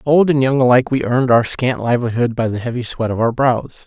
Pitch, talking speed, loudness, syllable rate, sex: 125 Hz, 250 wpm, -16 LUFS, 6.1 syllables/s, male